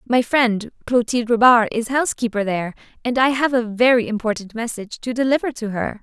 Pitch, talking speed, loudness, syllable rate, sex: 235 Hz, 180 wpm, -19 LUFS, 5.9 syllables/s, female